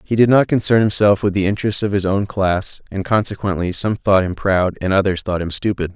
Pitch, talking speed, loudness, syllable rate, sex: 100 Hz, 230 wpm, -17 LUFS, 5.6 syllables/s, male